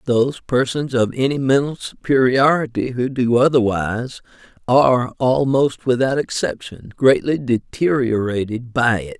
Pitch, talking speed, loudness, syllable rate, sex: 125 Hz, 110 wpm, -18 LUFS, 4.4 syllables/s, male